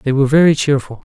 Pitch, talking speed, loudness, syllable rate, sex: 140 Hz, 215 wpm, -14 LUFS, 7.4 syllables/s, male